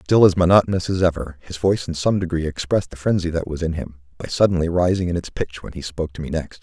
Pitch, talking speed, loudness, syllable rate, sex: 85 Hz, 260 wpm, -21 LUFS, 6.6 syllables/s, male